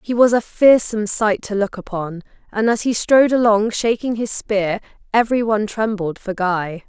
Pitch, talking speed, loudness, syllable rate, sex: 215 Hz, 185 wpm, -18 LUFS, 5.0 syllables/s, female